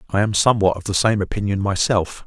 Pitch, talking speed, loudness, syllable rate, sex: 100 Hz, 210 wpm, -19 LUFS, 6.3 syllables/s, male